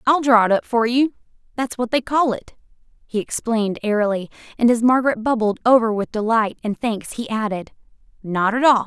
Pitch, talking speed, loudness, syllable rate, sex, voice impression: 230 Hz, 185 wpm, -19 LUFS, 5.5 syllables/s, female, feminine, adult-like, slightly clear, unique, slightly lively